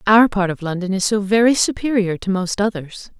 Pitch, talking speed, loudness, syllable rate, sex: 200 Hz, 205 wpm, -18 LUFS, 5.3 syllables/s, female